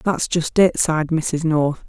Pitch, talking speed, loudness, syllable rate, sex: 160 Hz, 190 wpm, -19 LUFS, 4.0 syllables/s, female